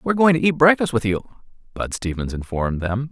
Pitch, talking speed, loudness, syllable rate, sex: 125 Hz, 210 wpm, -20 LUFS, 5.8 syllables/s, male